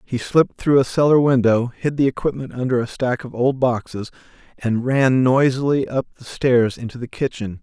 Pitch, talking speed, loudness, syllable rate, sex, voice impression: 125 Hz, 190 wpm, -19 LUFS, 5.1 syllables/s, male, very masculine, very adult-like, middle-aged, very thick, slightly tensed, powerful, slightly dark, soft, clear, slightly halting, cool, intellectual, slightly refreshing, very sincere, very calm, mature, friendly, very reassuring, slightly unique, slightly elegant, slightly wild, slightly sweet, kind